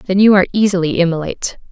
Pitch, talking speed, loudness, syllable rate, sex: 185 Hz, 175 wpm, -14 LUFS, 7.3 syllables/s, female